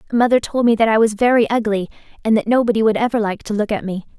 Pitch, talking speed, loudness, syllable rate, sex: 220 Hz, 260 wpm, -17 LUFS, 6.9 syllables/s, female